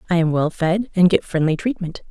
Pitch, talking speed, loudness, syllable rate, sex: 175 Hz, 230 wpm, -19 LUFS, 5.5 syllables/s, female